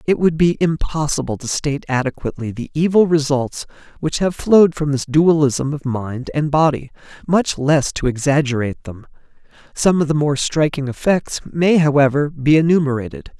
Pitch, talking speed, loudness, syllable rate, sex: 145 Hz, 155 wpm, -17 LUFS, 5.2 syllables/s, male